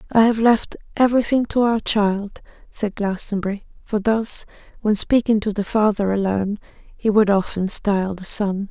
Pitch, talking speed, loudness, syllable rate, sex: 210 Hz, 160 wpm, -20 LUFS, 4.8 syllables/s, female